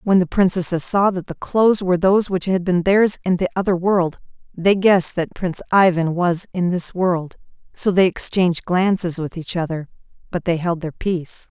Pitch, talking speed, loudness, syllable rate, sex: 180 Hz, 195 wpm, -18 LUFS, 5.2 syllables/s, female